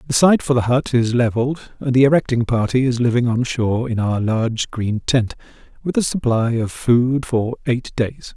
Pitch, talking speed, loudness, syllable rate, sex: 125 Hz, 200 wpm, -18 LUFS, 4.9 syllables/s, male